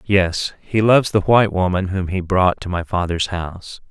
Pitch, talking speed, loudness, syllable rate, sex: 95 Hz, 200 wpm, -18 LUFS, 4.9 syllables/s, male